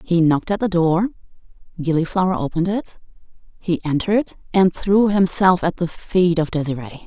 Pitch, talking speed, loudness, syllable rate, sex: 180 Hz, 155 wpm, -19 LUFS, 5.3 syllables/s, female